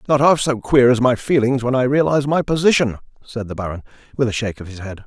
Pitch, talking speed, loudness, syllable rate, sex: 125 Hz, 250 wpm, -17 LUFS, 6.6 syllables/s, male